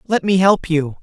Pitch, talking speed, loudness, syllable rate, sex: 180 Hz, 235 wpm, -16 LUFS, 4.5 syllables/s, male